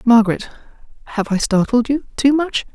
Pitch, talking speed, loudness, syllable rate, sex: 245 Hz, 155 wpm, -17 LUFS, 5.6 syllables/s, female